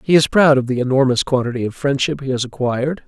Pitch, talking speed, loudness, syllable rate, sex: 135 Hz, 235 wpm, -17 LUFS, 6.5 syllables/s, male